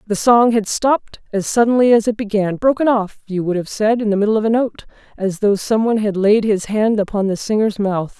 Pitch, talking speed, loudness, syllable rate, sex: 215 Hz, 225 wpm, -17 LUFS, 5.5 syllables/s, female